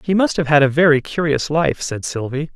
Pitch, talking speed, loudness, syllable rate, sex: 155 Hz, 235 wpm, -17 LUFS, 5.3 syllables/s, male